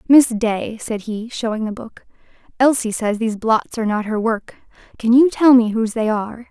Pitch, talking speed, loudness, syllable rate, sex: 230 Hz, 205 wpm, -18 LUFS, 5.2 syllables/s, female